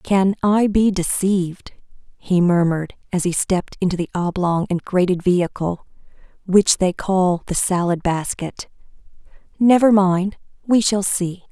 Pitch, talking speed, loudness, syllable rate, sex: 185 Hz, 135 wpm, -19 LUFS, 4.4 syllables/s, female